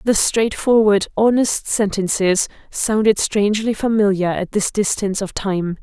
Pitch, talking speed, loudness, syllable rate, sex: 205 Hz, 125 wpm, -18 LUFS, 4.4 syllables/s, female